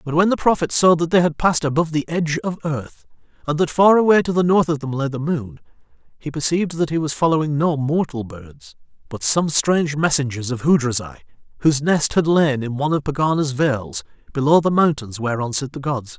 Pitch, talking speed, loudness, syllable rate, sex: 150 Hz, 210 wpm, -19 LUFS, 5.7 syllables/s, male